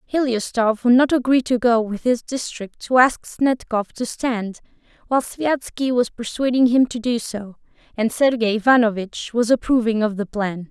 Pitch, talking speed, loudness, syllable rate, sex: 235 Hz, 170 wpm, -20 LUFS, 4.6 syllables/s, female